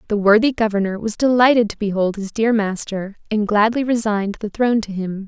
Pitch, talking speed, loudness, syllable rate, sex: 215 Hz, 195 wpm, -18 LUFS, 5.7 syllables/s, female